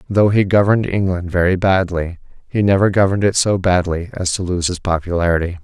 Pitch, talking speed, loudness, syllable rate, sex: 95 Hz, 180 wpm, -16 LUFS, 5.9 syllables/s, male